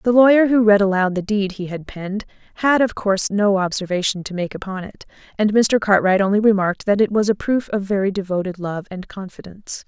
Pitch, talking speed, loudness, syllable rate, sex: 200 Hz, 215 wpm, -18 LUFS, 5.9 syllables/s, female